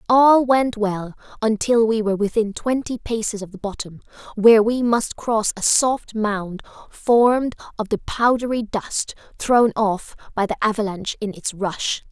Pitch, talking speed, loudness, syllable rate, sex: 220 Hz, 160 wpm, -20 LUFS, 4.4 syllables/s, female